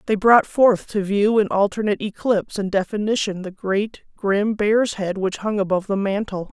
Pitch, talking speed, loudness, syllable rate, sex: 205 Hz, 180 wpm, -20 LUFS, 5.0 syllables/s, female